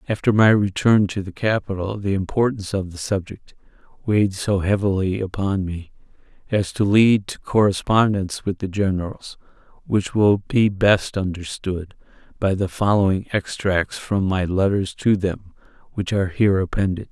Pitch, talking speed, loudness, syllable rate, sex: 100 Hz, 145 wpm, -20 LUFS, 4.9 syllables/s, male